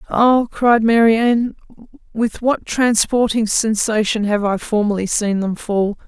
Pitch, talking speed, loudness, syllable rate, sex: 220 Hz, 130 wpm, -17 LUFS, 4.0 syllables/s, female